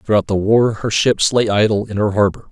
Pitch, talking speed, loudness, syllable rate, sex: 105 Hz, 240 wpm, -16 LUFS, 5.3 syllables/s, male